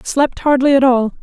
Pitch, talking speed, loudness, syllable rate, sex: 265 Hz, 195 wpm, -13 LUFS, 4.7 syllables/s, female